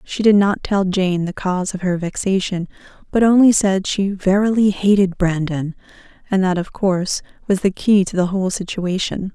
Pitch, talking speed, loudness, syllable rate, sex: 190 Hz, 180 wpm, -18 LUFS, 5.0 syllables/s, female